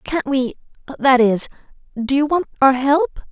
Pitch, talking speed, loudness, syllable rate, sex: 270 Hz, 125 wpm, -17 LUFS, 4.6 syllables/s, female